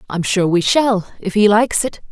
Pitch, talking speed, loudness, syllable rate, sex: 205 Hz, 200 wpm, -16 LUFS, 4.8 syllables/s, female